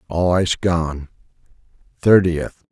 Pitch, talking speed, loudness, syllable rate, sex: 85 Hz, 90 wpm, -18 LUFS, 4.0 syllables/s, male